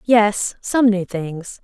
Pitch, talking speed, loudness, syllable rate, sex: 205 Hz, 145 wpm, -19 LUFS, 2.7 syllables/s, female